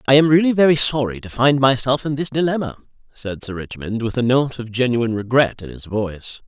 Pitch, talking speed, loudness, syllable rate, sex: 125 Hz, 215 wpm, -18 LUFS, 5.7 syllables/s, male